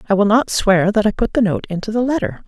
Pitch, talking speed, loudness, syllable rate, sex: 210 Hz, 290 wpm, -17 LUFS, 6.2 syllables/s, female